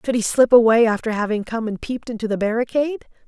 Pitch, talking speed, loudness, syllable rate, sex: 230 Hz, 220 wpm, -19 LUFS, 6.7 syllables/s, female